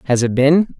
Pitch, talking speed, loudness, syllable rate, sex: 140 Hz, 225 wpm, -15 LUFS, 4.9 syllables/s, male